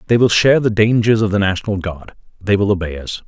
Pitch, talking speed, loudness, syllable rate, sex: 100 Hz, 240 wpm, -15 LUFS, 6.4 syllables/s, male